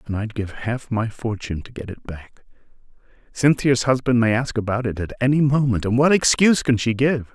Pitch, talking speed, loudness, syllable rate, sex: 120 Hz, 205 wpm, -20 LUFS, 5.5 syllables/s, male